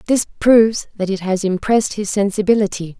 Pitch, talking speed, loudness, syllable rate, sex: 205 Hz, 160 wpm, -17 LUFS, 5.8 syllables/s, female